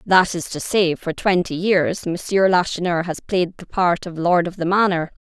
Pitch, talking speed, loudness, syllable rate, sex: 180 Hz, 205 wpm, -19 LUFS, 4.6 syllables/s, female